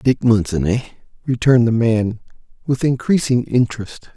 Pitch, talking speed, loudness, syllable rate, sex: 120 Hz, 130 wpm, -17 LUFS, 5.1 syllables/s, male